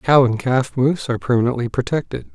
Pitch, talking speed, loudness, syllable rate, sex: 125 Hz, 180 wpm, -19 LUFS, 6.1 syllables/s, male